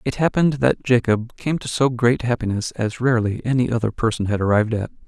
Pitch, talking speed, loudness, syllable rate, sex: 120 Hz, 200 wpm, -20 LUFS, 6.0 syllables/s, male